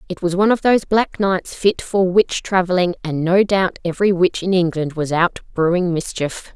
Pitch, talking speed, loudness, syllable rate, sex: 180 Hz, 200 wpm, -18 LUFS, 5.1 syllables/s, female